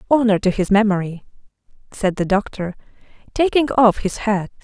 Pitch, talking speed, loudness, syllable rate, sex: 210 Hz, 140 wpm, -18 LUFS, 5.1 syllables/s, female